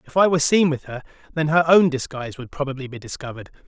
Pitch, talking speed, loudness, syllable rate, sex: 145 Hz, 230 wpm, -20 LUFS, 7.3 syllables/s, male